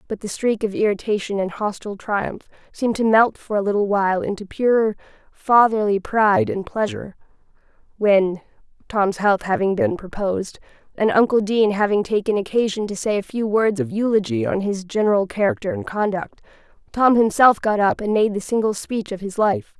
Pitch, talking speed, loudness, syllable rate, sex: 210 Hz, 175 wpm, -20 LUFS, 5.4 syllables/s, female